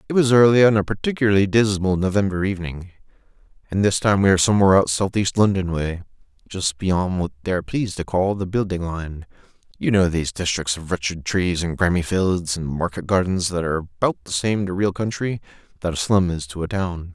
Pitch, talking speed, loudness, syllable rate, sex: 95 Hz, 200 wpm, -21 LUFS, 5.9 syllables/s, male